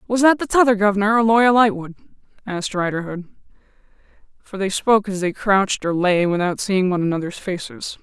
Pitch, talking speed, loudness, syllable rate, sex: 200 Hz, 170 wpm, -18 LUFS, 6.1 syllables/s, female